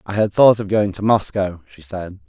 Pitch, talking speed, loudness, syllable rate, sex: 100 Hz, 235 wpm, -17 LUFS, 5.0 syllables/s, male